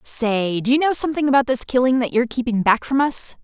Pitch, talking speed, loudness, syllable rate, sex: 250 Hz, 245 wpm, -19 LUFS, 6.2 syllables/s, female